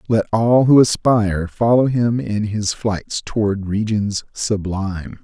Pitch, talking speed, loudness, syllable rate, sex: 105 Hz, 140 wpm, -18 LUFS, 3.9 syllables/s, male